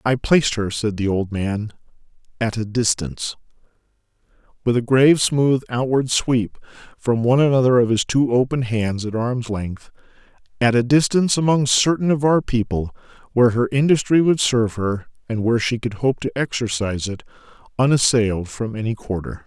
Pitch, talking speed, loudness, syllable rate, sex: 120 Hz, 160 wpm, -19 LUFS, 5.3 syllables/s, male